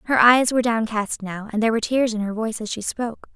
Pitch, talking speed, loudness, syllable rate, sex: 225 Hz, 270 wpm, -21 LUFS, 6.8 syllables/s, female